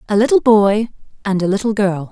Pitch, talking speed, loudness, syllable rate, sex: 205 Hz, 200 wpm, -15 LUFS, 5.6 syllables/s, female